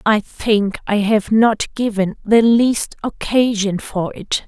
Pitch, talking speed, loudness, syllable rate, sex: 215 Hz, 145 wpm, -17 LUFS, 3.5 syllables/s, female